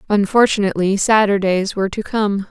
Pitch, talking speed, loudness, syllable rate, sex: 200 Hz, 145 wpm, -16 LUFS, 5.6 syllables/s, female